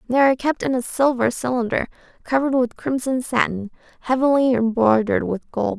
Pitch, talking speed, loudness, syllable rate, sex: 250 Hz, 155 wpm, -20 LUFS, 5.7 syllables/s, female